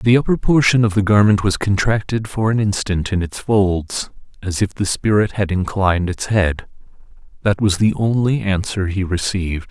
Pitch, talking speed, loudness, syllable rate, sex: 100 Hz, 180 wpm, -18 LUFS, 4.9 syllables/s, male